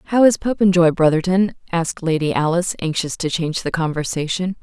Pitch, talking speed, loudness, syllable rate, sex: 175 Hz, 155 wpm, -18 LUFS, 6.0 syllables/s, female